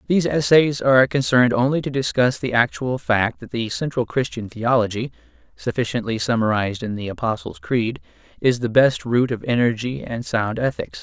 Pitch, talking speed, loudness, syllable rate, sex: 120 Hz, 165 wpm, -20 LUFS, 4.2 syllables/s, male